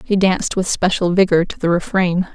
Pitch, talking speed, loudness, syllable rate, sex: 185 Hz, 205 wpm, -17 LUFS, 5.4 syllables/s, female